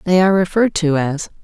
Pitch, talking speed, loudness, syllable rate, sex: 175 Hz, 210 wpm, -16 LUFS, 6.7 syllables/s, female